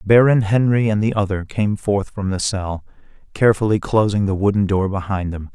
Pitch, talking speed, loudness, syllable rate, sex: 100 Hz, 185 wpm, -18 LUFS, 5.2 syllables/s, male